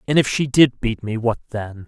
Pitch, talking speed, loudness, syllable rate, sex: 120 Hz, 255 wpm, -19 LUFS, 5.1 syllables/s, male